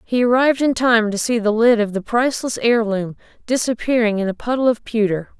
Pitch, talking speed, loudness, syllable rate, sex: 230 Hz, 200 wpm, -18 LUFS, 5.8 syllables/s, female